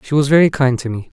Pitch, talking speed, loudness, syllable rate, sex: 135 Hz, 300 wpm, -15 LUFS, 6.7 syllables/s, male